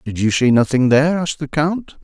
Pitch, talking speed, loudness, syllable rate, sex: 145 Hz, 235 wpm, -16 LUFS, 5.8 syllables/s, male